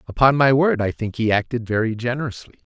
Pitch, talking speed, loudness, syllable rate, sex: 120 Hz, 200 wpm, -20 LUFS, 6.0 syllables/s, male